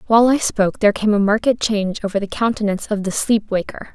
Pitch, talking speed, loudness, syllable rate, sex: 210 Hz, 230 wpm, -18 LUFS, 6.7 syllables/s, female